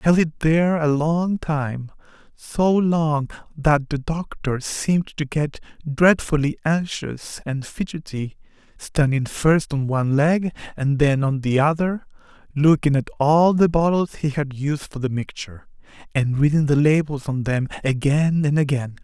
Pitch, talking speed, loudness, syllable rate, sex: 150 Hz, 150 wpm, -21 LUFS, 4.2 syllables/s, male